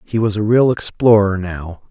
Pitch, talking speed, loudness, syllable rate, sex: 105 Hz, 190 wpm, -15 LUFS, 4.6 syllables/s, male